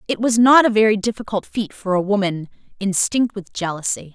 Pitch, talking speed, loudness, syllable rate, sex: 210 Hz, 190 wpm, -18 LUFS, 5.5 syllables/s, female